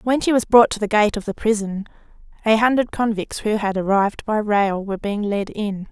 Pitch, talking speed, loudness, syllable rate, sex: 210 Hz, 225 wpm, -19 LUFS, 5.4 syllables/s, female